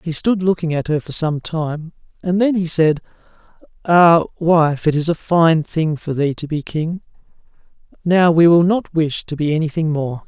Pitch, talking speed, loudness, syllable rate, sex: 160 Hz, 195 wpm, -17 LUFS, 4.6 syllables/s, male